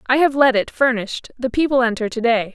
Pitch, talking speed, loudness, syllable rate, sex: 245 Hz, 235 wpm, -18 LUFS, 6.0 syllables/s, female